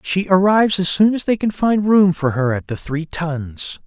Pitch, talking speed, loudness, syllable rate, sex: 175 Hz, 235 wpm, -17 LUFS, 4.6 syllables/s, male